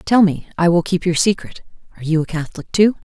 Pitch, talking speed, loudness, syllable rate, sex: 175 Hz, 195 wpm, -17 LUFS, 6.3 syllables/s, female